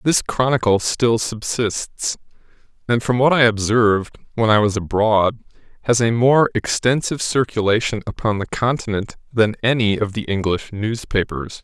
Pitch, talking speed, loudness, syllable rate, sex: 115 Hz, 140 wpm, -19 LUFS, 4.6 syllables/s, male